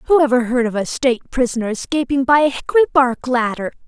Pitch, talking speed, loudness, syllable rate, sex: 255 Hz, 200 wpm, -17 LUFS, 6.4 syllables/s, female